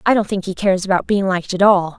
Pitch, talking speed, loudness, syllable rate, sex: 190 Hz, 305 wpm, -17 LUFS, 7.0 syllables/s, female